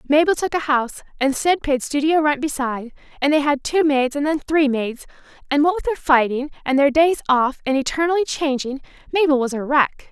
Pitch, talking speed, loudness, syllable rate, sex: 290 Hz, 200 wpm, -19 LUFS, 5.4 syllables/s, female